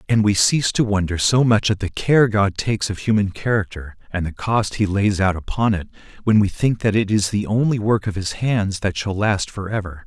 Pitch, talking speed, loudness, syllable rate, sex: 105 Hz, 240 wpm, -19 LUFS, 5.2 syllables/s, male